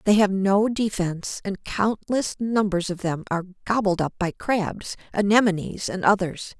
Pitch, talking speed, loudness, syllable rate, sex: 195 Hz, 155 wpm, -23 LUFS, 4.6 syllables/s, female